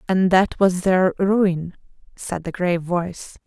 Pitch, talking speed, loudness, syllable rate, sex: 180 Hz, 155 wpm, -20 LUFS, 3.9 syllables/s, female